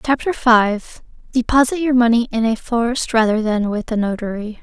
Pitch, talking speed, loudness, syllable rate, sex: 230 Hz, 155 wpm, -17 LUFS, 5.0 syllables/s, female